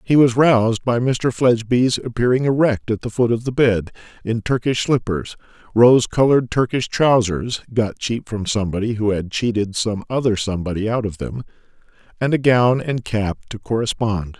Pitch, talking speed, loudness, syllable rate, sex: 115 Hz, 170 wpm, -19 LUFS, 3.6 syllables/s, male